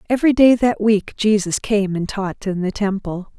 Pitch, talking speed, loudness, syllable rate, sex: 205 Hz, 195 wpm, -18 LUFS, 4.9 syllables/s, female